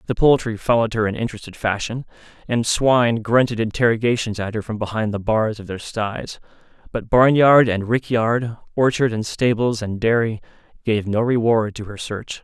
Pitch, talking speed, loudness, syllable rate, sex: 115 Hz, 170 wpm, -20 LUFS, 5.2 syllables/s, male